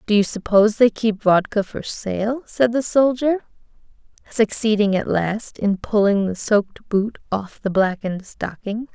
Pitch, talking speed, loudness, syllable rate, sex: 210 Hz, 155 wpm, -20 LUFS, 4.4 syllables/s, female